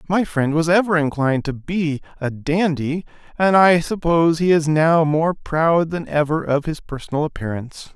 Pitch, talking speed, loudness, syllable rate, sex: 160 Hz, 175 wpm, -19 LUFS, 4.8 syllables/s, male